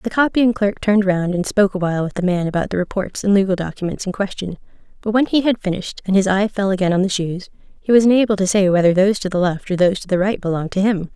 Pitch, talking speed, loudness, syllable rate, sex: 195 Hz, 270 wpm, -18 LUFS, 6.8 syllables/s, female